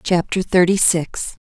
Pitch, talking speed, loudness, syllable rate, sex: 180 Hz, 125 wpm, -17 LUFS, 3.9 syllables/s, female